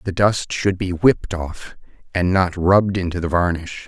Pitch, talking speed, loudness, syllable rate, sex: 90 Hz, 185 wpm, -19 LUFS, 4.8 syllables/s, male